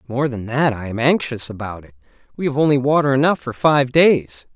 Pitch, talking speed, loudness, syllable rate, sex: 130 Hz, 210 wpm, -18 LUFS, 5.3 syllables/s, male